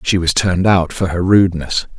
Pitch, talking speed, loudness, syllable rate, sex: 90 Hz, 210 wpm, -15 LUFS, 5.5 syllables/s, male